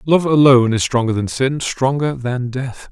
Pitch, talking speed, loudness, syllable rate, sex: 130 Hz, 165 wpm, -16 LUFS, 4.6 syllables/s, male